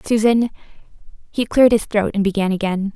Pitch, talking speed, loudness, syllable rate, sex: 210 Hz, 160 wpm, -18 LUFS, 6.0 syllables/s, female